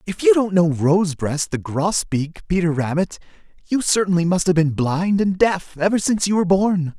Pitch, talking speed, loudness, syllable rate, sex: 170 Hz, 190 wpm, -19 LUFS, 5.0 syllables/s, male